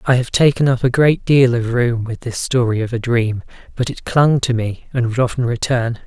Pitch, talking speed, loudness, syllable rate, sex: 120 Hz, 235 wpm, -17 LUFS, 5.1 syllables/s, male